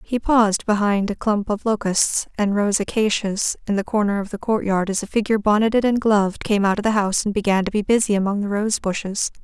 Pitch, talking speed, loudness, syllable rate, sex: 205 Hz, 230 wpm, -20 LUFS, 5.9 syllables/s, female